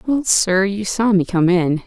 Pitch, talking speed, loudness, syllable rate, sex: 195 Hz, 225 wpm, -16 LUFS, 4.1 syllables/s, female